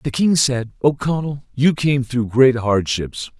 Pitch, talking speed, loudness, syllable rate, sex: 130 Hz, 175 wpm, -18 LUFS, 4.0 syllables/s, male